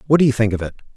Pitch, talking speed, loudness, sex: 120 Hz, 375 wpm, -18 LUFS, male